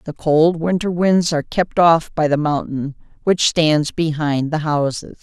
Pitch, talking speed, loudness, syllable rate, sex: 160 Hz, 170 wpm, -17 LUFS, 4.2 syllables/s, female